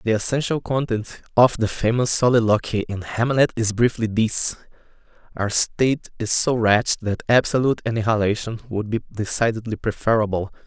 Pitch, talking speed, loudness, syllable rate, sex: 115 Hz, 135 wpm, -21 LUFS, 5.3 syllables/s, male